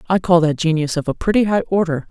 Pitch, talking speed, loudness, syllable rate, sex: 170 Hz, 255 wpm, -17 LUFS, 6.3 syllables/s, female